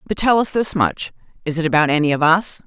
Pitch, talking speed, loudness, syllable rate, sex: 175 Hz, 225 wpm, -17 LUFS, 6.0 syllables/s, female